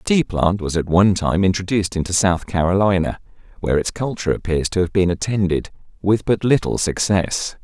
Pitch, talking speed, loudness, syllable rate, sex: 95 Hz, 180 wpm, -19 LUFS, 5.7 syllables/s, male